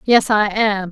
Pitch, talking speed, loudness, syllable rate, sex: 210 Hz, 200 wpm, -16 LUFS, 3.7 syllables/s, female